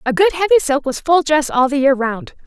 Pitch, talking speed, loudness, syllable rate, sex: 295 Hz, 265 wpm, -15 LUFS, 5.7 syllables/s, female